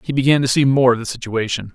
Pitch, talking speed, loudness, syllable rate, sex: 130 Hz, 275 wpm, -17 LUFS, 6.7 syllables/s, male